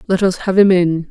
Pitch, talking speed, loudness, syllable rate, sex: 185 Hz, 270 wpm, -14 LUFS, 5.3 syllables/s, female